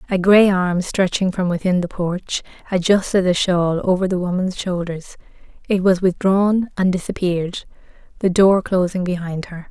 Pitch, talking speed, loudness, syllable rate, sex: 185 Hz, 155 wpm, -18 LUFS, 4.7 syllables/s, female